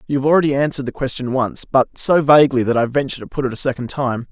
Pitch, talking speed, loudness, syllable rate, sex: 135 Hz, 265 wpm, -17 LUFS, 7.0 syllables/s, male